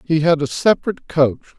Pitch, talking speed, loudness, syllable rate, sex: 160 Hz, 190 wpm, -18 LUFS, 6.2 syllables/s, male